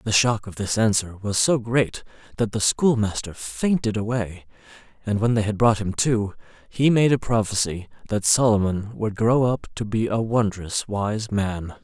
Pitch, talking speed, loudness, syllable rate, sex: 110 Hz, 175 wpm, -22 LUFS, 4.5 syllables/s, male